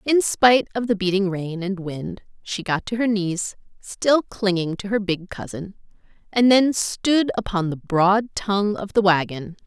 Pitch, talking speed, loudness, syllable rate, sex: 200 Hz, 180 wpm, -21 LUFS, 4.3 syllables/s, female